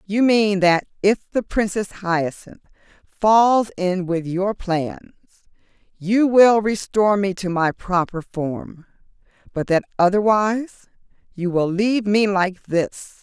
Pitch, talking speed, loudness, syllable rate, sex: 195 Hz, 130 wpm, -19 LUFS, 3.9 syllables/s, female